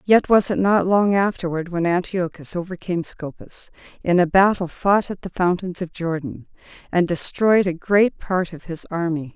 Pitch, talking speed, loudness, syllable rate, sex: 180 Hz, 175 wpm, -20 LUFS, 4.7 syllables/s, female